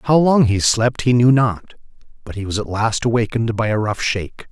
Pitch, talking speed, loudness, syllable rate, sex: 115 Hz, 225 wpm, -17 LUFS, 5.4 syllables/s, male